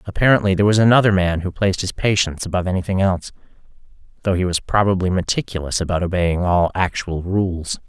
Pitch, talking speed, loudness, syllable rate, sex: 95 Hz, 170 wpm, -19 LUFS, 6.4 syllables/s, male